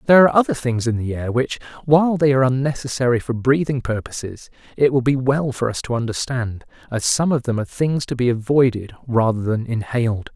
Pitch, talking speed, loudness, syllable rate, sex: 125 Hz, 205 wpm, -19 LUFS, 6.0 syllables/s, male